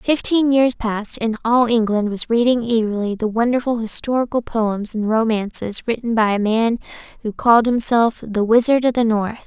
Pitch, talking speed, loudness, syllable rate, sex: 230 Hz, 170 wpm, -18 LUFS, 5.0 syllables/s, female